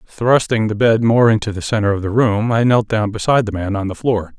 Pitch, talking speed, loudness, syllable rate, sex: 110 Hz, 260 wpm, -16 LUFS, 5.7 syllables/s, male